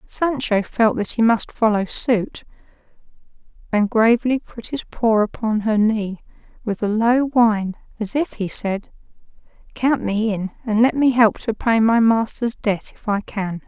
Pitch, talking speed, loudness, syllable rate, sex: 220 Hz, 165 wpm, -19 LUFS, 4.2 syllables/s, female